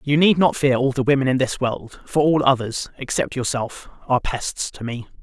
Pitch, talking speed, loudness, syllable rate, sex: 135 Hz, 220 wpm, -20 LUFS, 5.1 syllables/s, male